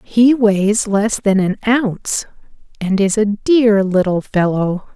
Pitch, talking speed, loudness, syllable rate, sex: 205 Hz, 145 wpm, -15 LUFS, 3.6 syllables/s, female